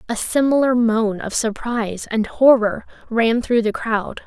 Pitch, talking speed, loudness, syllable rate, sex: 230 Hz, 155 wpm, -18 LUFS, 4.2 syllables/s, female